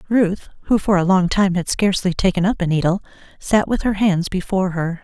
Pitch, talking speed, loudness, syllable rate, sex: 190 Hz, 215 wpm, -18 LUFS, 5.6 syllables/s, female